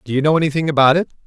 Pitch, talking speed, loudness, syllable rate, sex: 150 Hz, 285 wpm, -16 LUFS, 8.7 syllables/s, male